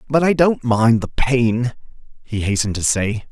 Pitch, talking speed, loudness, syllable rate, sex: 120 Hz, 180 wpm, -18 LUFS, 4.5 syllables/s, male